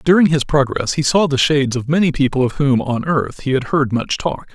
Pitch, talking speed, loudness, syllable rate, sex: 140 Hz, 250 wpm, -17 LUFS, 5.5 syllables/s, male